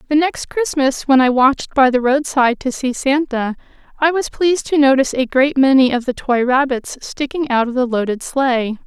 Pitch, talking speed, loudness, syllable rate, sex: 265 Hz, 210 wpm, -16 LUFS, 5.1 syllables/s, female